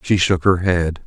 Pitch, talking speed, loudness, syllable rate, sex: 90 Hz, 225 wpm, -17 LUFS, 4.1 syllables/s, male